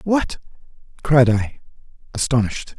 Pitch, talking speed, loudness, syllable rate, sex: 135 Hz, 85 wpm, -19 LUFS, 4.6 syllables/s, male